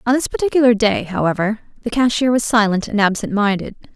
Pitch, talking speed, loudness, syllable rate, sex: 220 Hz, 180 wpm, -17 LUFS, 6.1 syllables/s, female